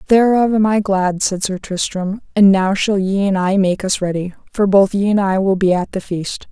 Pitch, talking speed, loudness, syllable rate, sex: 195 Hz, 240 wpm, -16 LUFS, 4.8 syllables/s, female